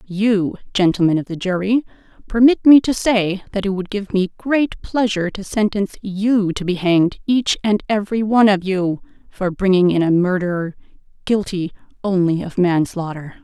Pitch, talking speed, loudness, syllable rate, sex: 195 Hz, 165 wpm, -18 LUFS, 5.0 syllables/s, female